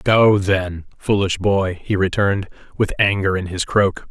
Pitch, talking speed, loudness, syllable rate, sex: 95 Hz, 160 wpm, -19 LUFS, 4.1 syllables/s, male